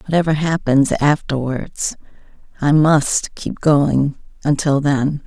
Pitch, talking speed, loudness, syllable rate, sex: 145 Hz, 105 wpm, -17 LUFS, 3.5 syllables/s, female